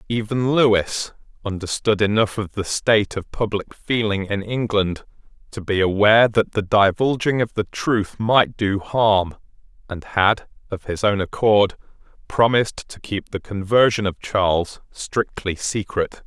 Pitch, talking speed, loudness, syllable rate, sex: 105 Hz, 145 wpm, -20 LUFS, 4.3 syllables/s, male